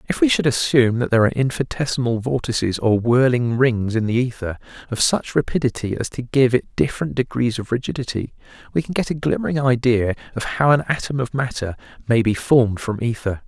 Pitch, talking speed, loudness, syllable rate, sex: 125 Hz, 190 wpm, -20 LUFS, 6.0 syllables/s, male